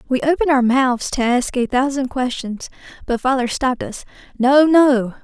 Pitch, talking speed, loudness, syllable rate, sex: 260 Hz, 170 wpm, -17 LUFS, 4.9 syllables/s, female